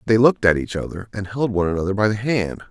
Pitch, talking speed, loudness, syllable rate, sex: 105 Hz, 265 wpm, -20 LUFS, 6.9 syllables/s, male